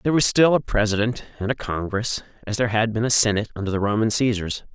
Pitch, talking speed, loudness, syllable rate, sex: 110 Hz, 225 wpm, -22 LUFS, 6.7 syllables/s, male